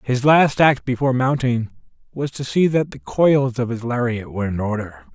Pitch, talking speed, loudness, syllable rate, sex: 125 Hz, 200 wpm, -19 LUFS, 5.0 syllables/s, male